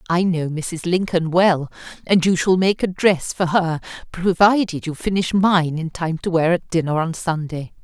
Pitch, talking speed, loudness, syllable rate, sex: 170 Hz, 190 wpm, -19 LUFS, 4.5 syllables/s, female